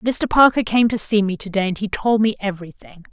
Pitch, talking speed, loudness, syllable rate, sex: 205 Hz, 250 wpm, -18 LUFS, 5.7 syllables/s, female